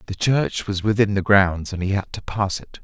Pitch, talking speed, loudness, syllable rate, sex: 100 Hz, 255 wpm, -21 LUFS, 4.9 syllables/s, male